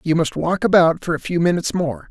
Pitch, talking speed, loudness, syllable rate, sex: 165 Hz, 255 wpm, -18 LUFS, 6.0 syllables/s, male